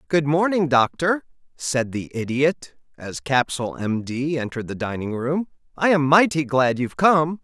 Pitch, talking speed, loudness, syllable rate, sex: 145 Hz, 160 wpm, -21 LUFS, 4.6 syllables/s, male